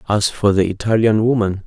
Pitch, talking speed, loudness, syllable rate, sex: 105 Hz, 180 wpm, -16 LUFS, 5.4 syllables/s, male